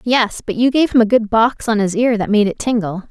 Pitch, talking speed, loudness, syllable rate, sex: 220 Hz, 290 wpm, -15 LUFS, 5.5 syllables/s, female